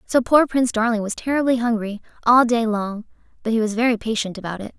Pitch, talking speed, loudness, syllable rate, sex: 230 Hz, 215 wpm, -20 LUFS, 6.2 syllables/s, female